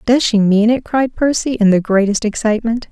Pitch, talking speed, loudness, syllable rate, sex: 225 Hz, 205 wpm, -14 LUFS, 5.4 syllables/s, female